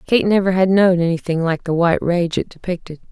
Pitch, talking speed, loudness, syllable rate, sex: 180 Hz, 210 wpm, -17 LUFS, 5.9 syllables/s, female